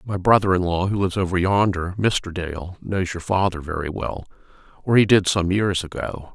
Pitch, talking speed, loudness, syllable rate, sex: 90 Hz, 190 wpm, -21 LUFS, 5.1 syllables/s, male